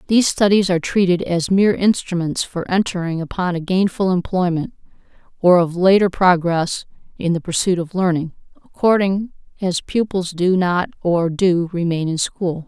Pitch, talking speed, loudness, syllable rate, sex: 180 Hz, 150 wpm, -18 LUFS, 4.9 syllables/s, female